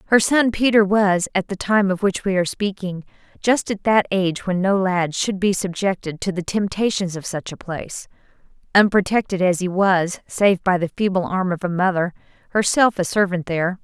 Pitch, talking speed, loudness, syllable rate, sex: 190 Hz, 195 wpm, -20 LUFS, 5.1 syllables/s, female